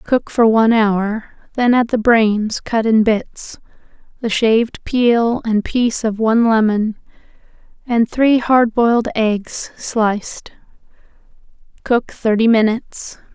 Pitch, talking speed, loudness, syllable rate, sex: 225 Hz, 125 wpm, -16 LUFS, 3.8 syllables/s, female